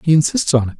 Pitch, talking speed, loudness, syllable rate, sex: 150 Hz, 300 wpm, -16 LUFS, 7.3 syllables/s, male